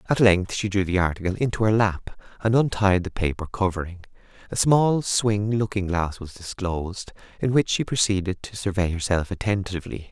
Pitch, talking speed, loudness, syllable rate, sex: 100 Hz, 170 wpm, -23 LUFS, 5.3 syllables/s, male